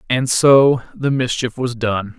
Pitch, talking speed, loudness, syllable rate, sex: 125 Hz, 165 wpm, -16 LUFS, 3.7 syllables/s, male